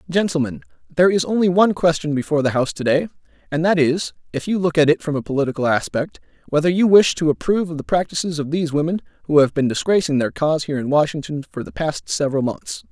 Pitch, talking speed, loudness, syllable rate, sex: 160 Hz, 220 wpm, -19 LUFS, 6.8 syllables/s, male